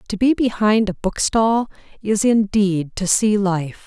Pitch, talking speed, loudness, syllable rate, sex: 205 Hz, 155 wpm, -18 LUFS, 3.9 syllables/s, female